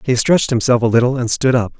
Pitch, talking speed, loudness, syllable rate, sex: 125 Hz, 265 wpm, -15 LUFS, 6.6 syllables/s, male